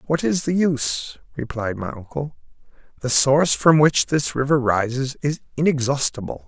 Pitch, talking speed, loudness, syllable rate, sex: 135 Hz, 150 wpm, -20 LUFS, 4.9 syllables/s, male